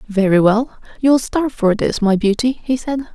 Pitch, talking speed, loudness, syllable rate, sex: 230 Hz, 190 wpm, -16 LUFS, 4.9 syllables/s, female